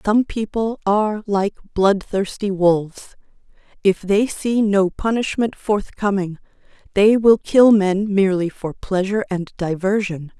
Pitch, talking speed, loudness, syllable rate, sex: 200 Hz, 120 wpm, -19 LUFS, 4.1 syllables/s, female